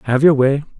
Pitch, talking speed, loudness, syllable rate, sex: 140 Hz, 225 wpm, -15 LUFS, 5.8 syllables/s, male